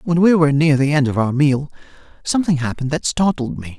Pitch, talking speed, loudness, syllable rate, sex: 145 Hz, 220 wpm, -17 LUFS, 6.3 syllables/s, male